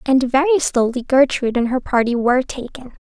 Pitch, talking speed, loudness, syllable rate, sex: 260 Hz, 175 wpm, -17 LUFS, 5.7 syllables/s, female